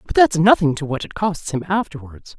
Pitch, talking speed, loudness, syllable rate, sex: 170 Hz, 225 wpm, -18 LUFS, 5.2 syllables/s, female